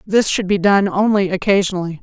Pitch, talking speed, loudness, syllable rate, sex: 195 Hz, 180 wpm, -16 LUFS, 5.8 syllables/s, female